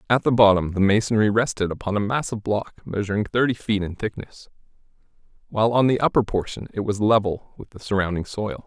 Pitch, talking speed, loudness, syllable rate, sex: 105 Hz, 185 wpm, -22 LUFS, 6.0 syllables/s, male